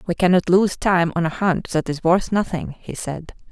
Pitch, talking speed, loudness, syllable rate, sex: 175 Hz, 220 wpm, -20 LUFS, 4.7 syllables/s, female